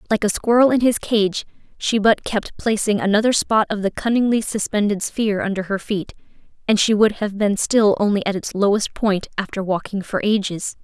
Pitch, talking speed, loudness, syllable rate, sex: 210 Hz, 195 wpm, -19 LUFS, 5.2 syllables/s, female